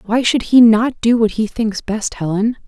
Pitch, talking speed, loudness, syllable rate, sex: 225 Hz, 225 wpm, -15 LUFS, 4.5 syllables/s, female